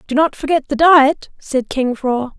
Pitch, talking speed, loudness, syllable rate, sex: 275 Hz, 200 wpm, -15 LUFS, 4.4 syllables/s, female